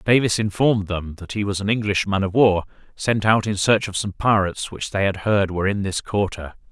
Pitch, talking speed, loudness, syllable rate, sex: 100 Hz, 230 wpm, -21 LUFS, 5.5 syllables/s, male